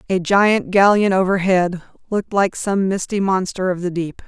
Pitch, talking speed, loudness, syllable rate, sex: 190 Hz, 170 wpm, -18 LUFS, 4.8 syllables/s, female